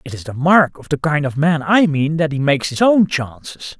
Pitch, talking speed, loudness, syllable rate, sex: 150 Hz, 270 wpm, -16 LUFS, 5.2 syllables/s, male